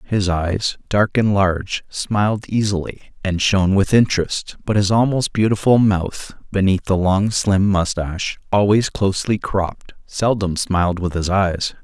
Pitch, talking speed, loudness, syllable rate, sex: 100 Hz, 145 wpm, -18 LUFS, 4.5 syllables/s, male